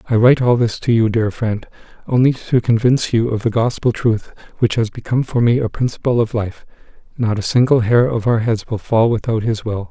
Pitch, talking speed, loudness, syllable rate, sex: 115 Hz, 225 wpm, -17 LUFS, 5.6 syllables/s, male